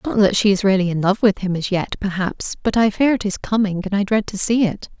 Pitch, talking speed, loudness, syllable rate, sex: 200 Hz, 290 wpm, -19 LUFS, 5.9 syllables/s, female